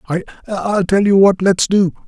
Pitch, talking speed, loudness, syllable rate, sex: 190 Hz, 175 wpm, -14 LUFS, 5.1 syllables/s, male